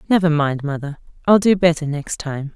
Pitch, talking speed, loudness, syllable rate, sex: 160 Hz, 190 wpm, -18 LUFS, 5.2 syllables/s, female